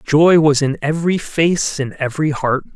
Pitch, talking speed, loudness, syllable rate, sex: 150 Hz, 175 wpm, -16 LUFS, 4.8 syllables/s, male